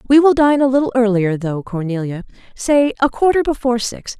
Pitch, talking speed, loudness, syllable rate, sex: 240 Hz, 185 wpm, -16 LUFS, 5.5 syllables/s, female